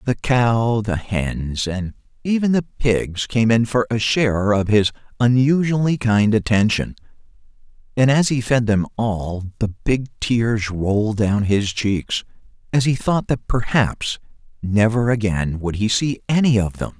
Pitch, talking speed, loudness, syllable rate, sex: 110 Hz, 155 wpm, -19 LUFS, 4.0 syllables/s, male